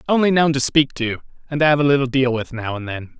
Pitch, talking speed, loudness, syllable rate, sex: 135 Hz, 280 wpm, -18 LUFS, 6.2 syllables/s, male